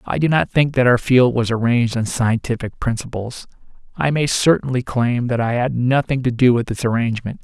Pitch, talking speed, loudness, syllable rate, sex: 120 Hz, 200 wpm, -18 LUFS, 5.4 syllables/s, male